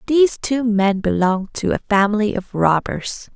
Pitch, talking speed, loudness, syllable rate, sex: 210 Hz, 160 wpm, -18 LUFS, 4.8 syllables/s, female